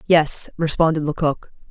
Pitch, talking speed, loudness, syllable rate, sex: 155 Hz, 105 wpm, -19 LUFS, 4.5 syllables/s, female